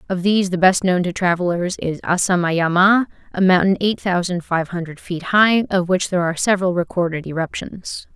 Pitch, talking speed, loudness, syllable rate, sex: 180 Hz, 175 wpm, -18 LUFS, 5.5 syllables/s, female